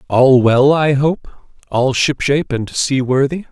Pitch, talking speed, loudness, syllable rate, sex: 135 Hz, 135 wpm, -14 LUFS, 4.0 syllables/s, male